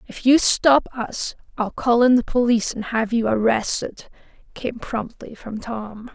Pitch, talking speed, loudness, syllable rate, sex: 235 Hz, 165 wpm, -20 LUFS, 4.2 syllables/s, female